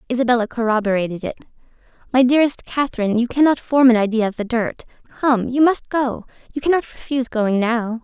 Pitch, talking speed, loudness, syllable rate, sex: 245 Hz, 170 wpm, -18 LUFS, 6.2 syllables/s, female